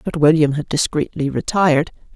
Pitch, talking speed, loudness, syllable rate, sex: 155 Hz, 140 wpm, -17 LUFS, 5.4 syllables/s, female